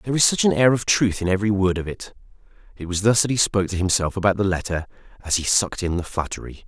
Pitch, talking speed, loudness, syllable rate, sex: 95 Hz, 260 wpm, -21 LUFS, 7.0 syllables/s, male